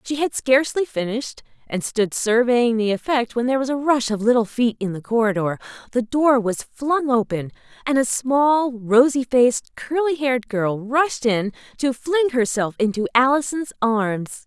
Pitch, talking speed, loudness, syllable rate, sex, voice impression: 245 Hz, 170 wpm, -20 LUFS, 4.7 syllables/s, female, very feminine, very adult-like, thin, tensed, very powerful, bright, slightly hard, very clear, very fluent, slightly raspy, very cool, very intellectual, very refreshing, sincere, slightly calm, very friendly, very reassuring, very unique, elegant, slightly wild, sweet, lively, slightly kind, slightly intense, slightly sharp, light